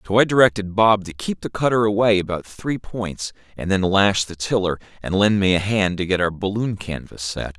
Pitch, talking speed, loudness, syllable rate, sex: 100 Hz, 220 wpm, -20 LUFS, 5.2 syllables/s, male